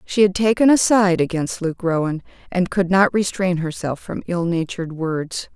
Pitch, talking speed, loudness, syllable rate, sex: 180 Hz, 185 wpm, -19 LUFS, 4.8 syllables/s, female